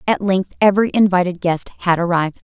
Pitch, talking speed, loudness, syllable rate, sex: 185 Hz, 165 wpm, -17 LUFS, 6.2 syllables/s, female